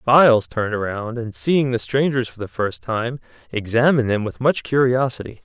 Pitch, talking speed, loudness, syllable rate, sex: 120 Hz, 175 wpm, -20 LUFS, 5.2 syllables/s, male